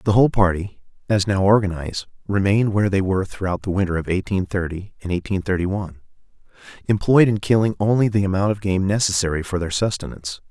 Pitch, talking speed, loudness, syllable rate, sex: 95 Hz, 185 wpm, -20 LUFS, 6.5 syllables/s, male